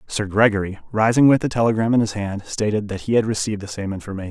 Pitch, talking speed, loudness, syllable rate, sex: 105 Hz, 235 wpm, -20 LUFS, 6.9 syllables/s, male